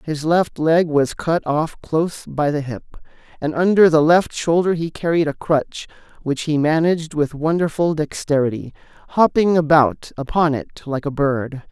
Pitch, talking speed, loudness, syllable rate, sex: 155 Hz, 165 wpm, -18 LUFS, 4.6 syllables/s, male